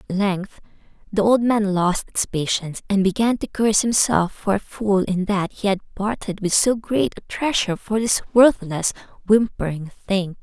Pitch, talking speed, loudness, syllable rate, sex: 200 Hz, 175 wpm, -20 LUFS, 4.7 syllables/s, female